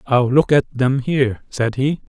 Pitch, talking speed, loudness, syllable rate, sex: 130 Hz, 190 wpm, -18 LUFS, 4.3 syllables/s, male